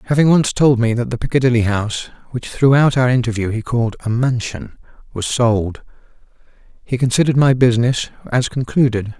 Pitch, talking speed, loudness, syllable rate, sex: 120 Hz, 145 wpm, -16 LUFS, 5.7 syllables/s, male